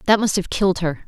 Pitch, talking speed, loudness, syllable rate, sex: 190 Hz, 280 wpm, -19 LUFS, 6.6 syllables/s, female